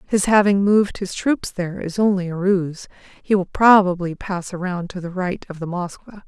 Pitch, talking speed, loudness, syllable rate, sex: 190 Hz, 200 wpm, -20 LUFS, 4.8 syllables/s, female